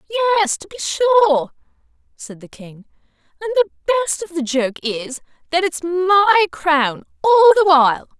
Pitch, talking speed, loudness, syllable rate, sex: 340 Hz, 155 wpm, -16 LUFS, 6.5 syllables/s, female